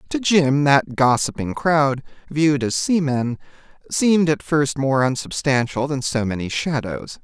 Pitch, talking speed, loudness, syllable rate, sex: 140 Hz, 140 wpm, -20 LUFS, 4.3 syllables/s, male